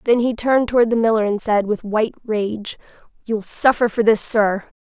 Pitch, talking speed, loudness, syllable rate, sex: 220 Hz, 200 wpm, -18 LUFS, 5.3 syllables/s, female